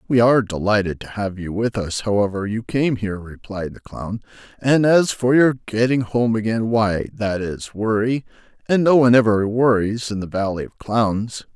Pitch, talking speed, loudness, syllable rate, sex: 110 Hz, 185 wpm, -19 LUFS, 4.8 syllables/s, male